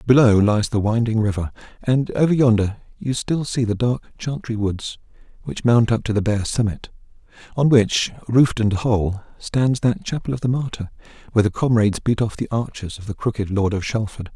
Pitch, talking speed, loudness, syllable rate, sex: 115 Hz, 190 wpm, -20 LUFS, 5.4 syllables/s, male